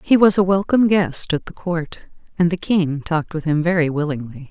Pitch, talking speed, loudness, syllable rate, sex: 170 Hz, 215 wpm, -19 LUFS, 5.3 syllables/s, female